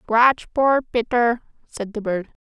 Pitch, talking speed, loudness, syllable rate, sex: 230 Hz, 150 wpm, -20 LUFS, 3.7 syllables/s, female